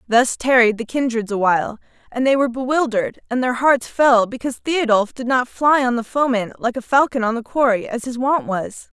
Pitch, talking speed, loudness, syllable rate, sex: 245 Hz, 205 wpm, -18 LUFS, 5.4 syllables/s, female